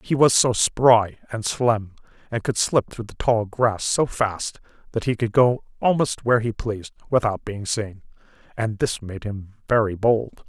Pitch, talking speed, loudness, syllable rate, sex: 115 Hz, 185 wpm, -22 LUFS, 4.3 syllables/s, male